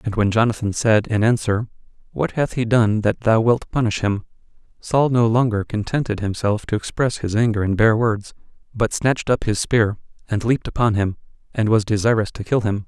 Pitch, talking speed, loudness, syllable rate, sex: 110 Hz, 195 wpm, -20 LUFS, 5.3 syllables/s, male